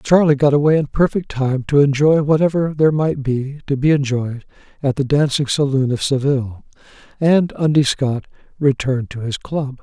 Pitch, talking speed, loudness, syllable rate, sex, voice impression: 140 Hz, 170 wpm, -17 LUFS, 5.1 syllables/s, male, masculine, middle-aged, slightly relaxed, weak, slightly dark, soft, raspy, calm, friendly, wild, kind, modest